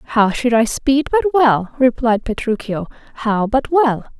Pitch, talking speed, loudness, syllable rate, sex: 250 Hz, 145 wpm, -17 LUFS, 4.0 syllables/s, female